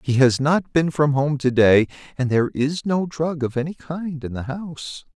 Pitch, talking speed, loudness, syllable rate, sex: 145 Hz, 220 wpm, -21 LUFS, 4.7 syllables/s, male